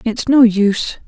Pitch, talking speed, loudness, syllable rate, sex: 225 Hz, 165 wpm, -14 LUFS, 4.4 syllables/s, female